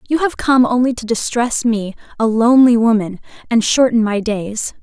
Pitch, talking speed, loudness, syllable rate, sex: 230 Hz, 175 wpm, -15 LUFS, 4.9 syllables/s, female